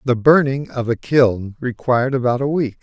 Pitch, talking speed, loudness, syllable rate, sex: 125 Hz, 190 wpm, -18 LUFS, 4.9 syllables/s, male